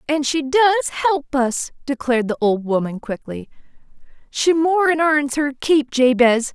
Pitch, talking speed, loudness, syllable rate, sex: 280 Hz, 145 wpm, -18 LUFS, 4.3 syllables/s, female